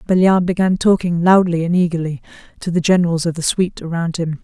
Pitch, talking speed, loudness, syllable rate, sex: 175 Hz, 190 wpm, -16 LUFS, 6.2 syllables/s, female